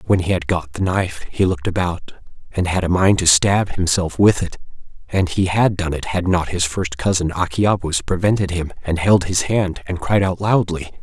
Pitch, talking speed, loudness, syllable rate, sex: 90 Hz, 210 wpm, -18 LUFS, 5.1 syllables/s, male